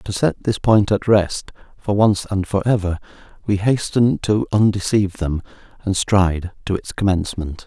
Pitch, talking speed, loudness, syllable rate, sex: 95 Hz, 165 wpm, -19 LUFS, 4.7 syllables/s, male